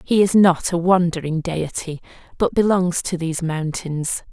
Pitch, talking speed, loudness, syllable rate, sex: 170 Hz, 155 wpm, -19 LUFS, 4.5 syllables/s, female